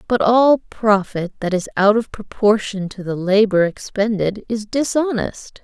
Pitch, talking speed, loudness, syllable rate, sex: 210 Hz, 150 wpm, -18 LUFS, 4.2 syllables/s, female